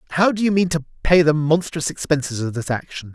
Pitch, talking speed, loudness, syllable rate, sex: 155 Hz, 230 wpm, -19 LUFS, 6.1 syllables/s, male